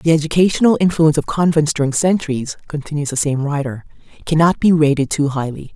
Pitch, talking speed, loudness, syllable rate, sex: 155 Hz, 165 wpm, -16 LUFS, 6.1 syllables/s, female